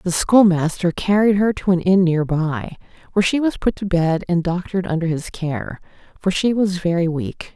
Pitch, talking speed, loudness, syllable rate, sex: 180 Hz, 200 wpm, -19 LUFS, 4.9 syllables/s, female